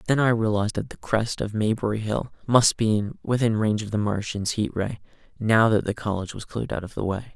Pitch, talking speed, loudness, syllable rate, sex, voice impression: 110 Hz, 230 wpm, -24 LUFS, 5.9 syllables/s, male, masculine, adult-like, slightly relaxed, slightly weak, soft, slightly fluent, slightly raspy, cool, refreshing, calm, friendly, reassuring, kind, modest